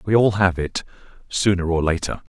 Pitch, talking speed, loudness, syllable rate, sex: 95 Hz, 180 wpm, -21 LUFS, 5.3 syllables/s, male